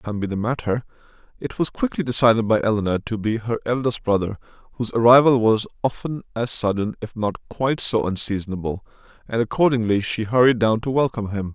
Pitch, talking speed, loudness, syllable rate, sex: 115 Hz, 180 wpm, -21 LUFS, 6.1 syllables/s, male